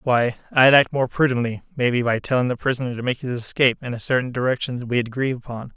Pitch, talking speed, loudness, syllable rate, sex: 125 Hz, 230 wpm, -21 LUFS, 6.5 syllables/s, male